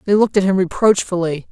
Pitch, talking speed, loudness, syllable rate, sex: 190 Hz, 200 wpm, -16 LUFS, 6.6 syllables/s, female